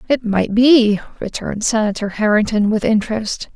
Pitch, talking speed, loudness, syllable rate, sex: 220 Hz, 135 wpm, -16 LUFS, 5.1 syllables/s, female